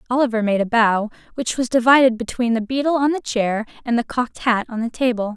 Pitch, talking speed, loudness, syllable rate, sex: 240 Hz, 225 wpm, -19 LUFS, 5.9 syllables/s, female